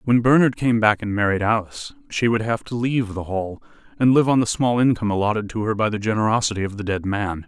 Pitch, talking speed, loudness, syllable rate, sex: 110 Hz, 240 wpm, -20 LUFS, 6.3 syllables/s, male